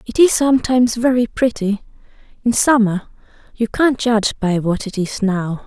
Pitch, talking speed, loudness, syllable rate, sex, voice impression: 225 Hz, 150 wpm, -17 LUFS, 5.0 syllables/s, female, feminine, slightly young, relaxed, slightly weak, slightly dark, soft, slightly raspy, intellectual, calm, slightly friendly, reassuring, slightly unique, modest